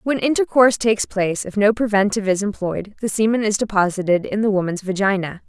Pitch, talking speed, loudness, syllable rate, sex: 205 Hz, 185 wpm, -19 LUFS, 6.2 syllables/s, female